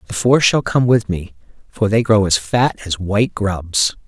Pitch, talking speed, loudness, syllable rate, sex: 105 Hz, 205 wpm, -16 LUFS, 4.4 syllables/s, male